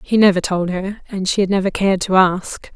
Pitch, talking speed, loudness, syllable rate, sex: 190 Hz, 240 wpm, -17 LUFS, 5.6 syllables/s, female